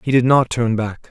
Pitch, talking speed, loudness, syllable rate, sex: 120 Hz, 270 wpm, -17 LUFS, 5.0 syllables/s, male